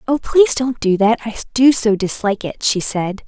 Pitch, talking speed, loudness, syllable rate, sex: 220 Hz, 220 wpm, -16 LUFS, 5.2 syllables/s, female